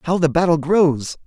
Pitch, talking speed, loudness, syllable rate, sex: 160 Hz, 190 wpm, -17 LUFS, 4.8 syllables/s, male